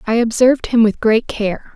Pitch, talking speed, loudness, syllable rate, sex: 225 Hz, 205 wpm, -15 LUFS, 5.0 syllables/s, female